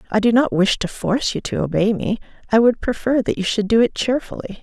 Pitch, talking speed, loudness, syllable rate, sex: 220 Hz, 245 wpm, -19 LUFS, 5.9 syllables/s, female